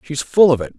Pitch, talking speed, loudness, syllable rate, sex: 150 Hz, 305 wpm, -15 LUFS, 6.6 syllables/s, male